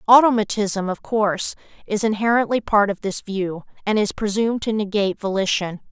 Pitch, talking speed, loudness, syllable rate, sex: 205 Hz, 150 wpm, -21 LUFS, 5.6 syllables/s, female